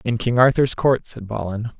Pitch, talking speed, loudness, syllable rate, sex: 115 Hz, 200 wpm, -20 LUFS, 4.8 syllables/s, male